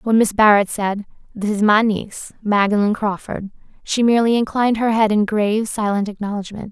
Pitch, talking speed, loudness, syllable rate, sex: 210 Hz, 170 wpm, -18 LUFS, 5.7 syllables/s, female